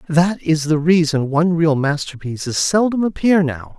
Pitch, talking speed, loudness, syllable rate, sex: 160 Hz, 160 wpm, -17 LUFS, 4.7 syllables/s, male